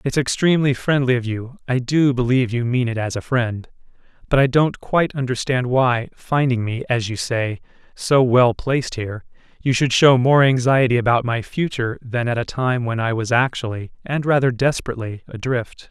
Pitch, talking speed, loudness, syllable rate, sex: 125 Hz, 175 wpm, -19 LUFS, 5.3 syllables/s, male